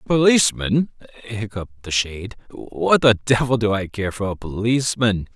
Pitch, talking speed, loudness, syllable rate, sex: 110 Hz, 145 wpm, -20 LUFS, 4.9 syllables/s, male